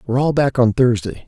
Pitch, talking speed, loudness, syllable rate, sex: 125 Hz, 235 wpm, -17 LUFS, 6.2 syllables/s, male